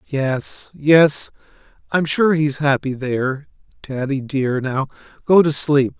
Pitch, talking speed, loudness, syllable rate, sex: 140 Hz, 130 wpm, -18 LUFS, 3.6 syllables/s, male